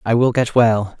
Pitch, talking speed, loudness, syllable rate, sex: 115 Hz, 240 wpm, -16 LUFS, 4.5 syllables/s, male